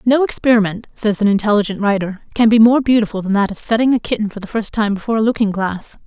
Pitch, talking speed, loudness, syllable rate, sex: 215 Hz, 235 wpm, -16 LUFS, 6.6 syllables/s, female